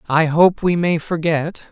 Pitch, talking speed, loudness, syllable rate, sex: 165 Hz, 175 wpm, -17 LUFS, 4.0 syllables/s, male